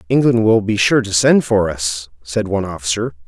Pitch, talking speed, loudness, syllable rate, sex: 105 Hz, 200 wpm, -16 LUFS, 5.3 syllables/s, male